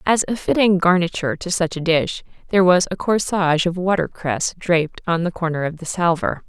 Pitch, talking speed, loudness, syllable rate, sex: 175 Hz, 195 wpm, -19 LUFS, 5.6 syllables/s, female